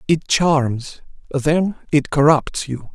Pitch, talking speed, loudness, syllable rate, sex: 145 Hz, 120 wpm, -18 LUFS, 3.1 syllables/s, male